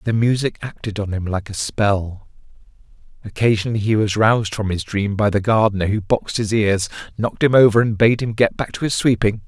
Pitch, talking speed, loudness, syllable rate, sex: 105 Hz, 210 wpm, -18 LUFS, 5.7 syllables/s, male